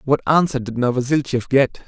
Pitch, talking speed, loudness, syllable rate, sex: 130 Hz, 160 wpm, -19 LUFS, 5.5 syllables/s, male